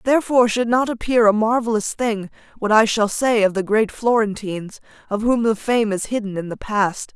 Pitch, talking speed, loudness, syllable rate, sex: 220 Hz, 200 wpm, -19 LUFS, 5.3 syllables/s, female